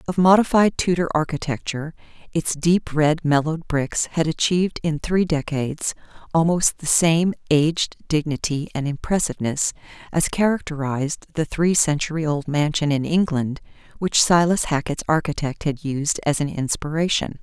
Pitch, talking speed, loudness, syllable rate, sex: 155 Hz, 135 wpm, -21 LUFS, 5.0 syllables/s, female